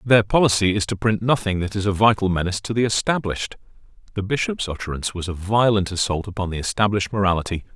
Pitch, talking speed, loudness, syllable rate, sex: 100 Hz, 195 wpm, -21 LUFS, 6.7 syllables/s, male